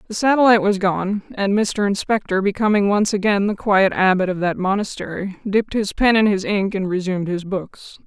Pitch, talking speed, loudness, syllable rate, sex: 200 Hz, 195 wpm, -19 LUFS, 5.3 syllables/s, female